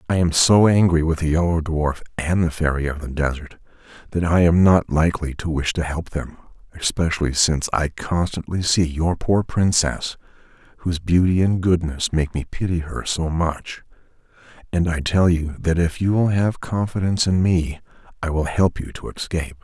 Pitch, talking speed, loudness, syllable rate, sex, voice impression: 85 Hz, 185 wpm, -20 LUFS, 5.0 syllables/s, male, masculine, adult-like, relaxed, slightly weak, soft, slightly muffled, fluent, raspy, cool, intellectual, sincere, calm, mature, wild, slightly modest